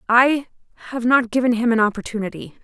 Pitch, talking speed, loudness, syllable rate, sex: 235 Hz, 160 wpm, -19 LUFS, 6.0 syllables/s, female